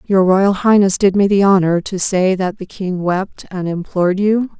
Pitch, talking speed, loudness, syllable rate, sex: 190 Hz, 210 wpm, -15 LUFS, 4.5 syllables/s, female